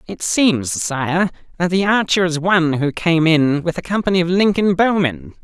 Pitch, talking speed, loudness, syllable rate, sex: 170 Hz, 190 wpm, -17 LUFS, 4.7 syllables/s, male